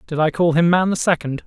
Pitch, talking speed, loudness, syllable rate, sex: 165 Hz, 285 wpm, -18 LUFS, 6.0 syllables/s, male